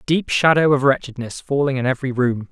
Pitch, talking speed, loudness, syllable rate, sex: 135 Hz, 190 wpm, -18 LUFS, 5.9 syllables/s, male